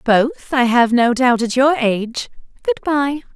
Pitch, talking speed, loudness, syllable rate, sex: 245 Hz, 180 wpm, -16 LUFS, 4.0 syllables/s, female